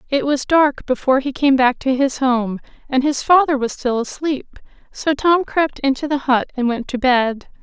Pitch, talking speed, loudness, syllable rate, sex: 270 Hz, 205 wpm, -18 LUFS, 4.7 syllables/s, female